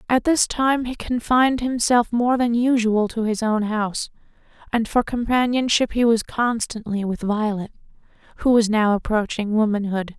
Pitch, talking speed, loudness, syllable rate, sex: 230 Hz, 155 wpm, -21 LUFS, 4.8 syllables/s, female